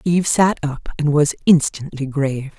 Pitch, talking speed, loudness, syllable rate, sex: 150 Hz, 160 wpm, -18 LUFS, 4.9 syllables/s, female